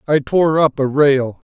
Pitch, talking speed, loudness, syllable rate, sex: 140 Hz, 200 wpm, -15 LUFS, 3.9 syllables/s, male